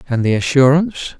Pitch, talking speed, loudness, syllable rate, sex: 140 Hz, 150 wpm, -15 LUFS, 6.3 syllables/s, male